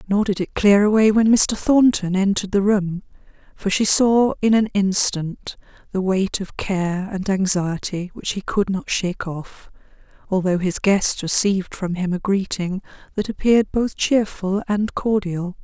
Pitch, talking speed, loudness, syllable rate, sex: 195 Hz, 165 wpm, -20 LUFS, 4.4 syllables/s, female